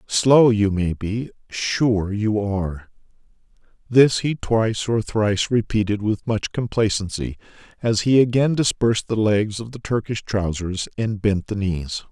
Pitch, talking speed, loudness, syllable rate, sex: 105 Hz, 150 wpm, -21 LUFS, 4.2 syllables/s, male